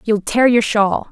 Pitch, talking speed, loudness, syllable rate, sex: 215 Hz, 215 wpm, -15 LUFS, 4.0 syllables/s, female